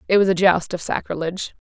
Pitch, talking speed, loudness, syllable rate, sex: 180 Hz, 220 wpm, -20 LUFS, 6.4 syllables/s, female